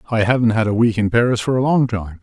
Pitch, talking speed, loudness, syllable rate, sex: 115 Hz, 295 wpm, -17 LUFS, 6.5 syllables/s, male